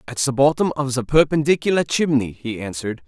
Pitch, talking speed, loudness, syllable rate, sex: 135 Hz, 175 wpm, -19 LUFS, 5.9 syllables/s, male